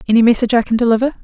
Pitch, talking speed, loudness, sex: 235 Hz, 245 wpm, -14 LUFS, female